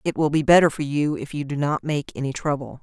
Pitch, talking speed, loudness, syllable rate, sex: 145 Hz, 275 wpm, -22 LUFS, 5.9 syllables/s, female